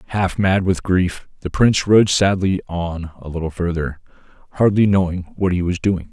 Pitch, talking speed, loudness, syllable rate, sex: 90 Hz, 175 wpm, -18 LUFS, 4.8 syllables/s, male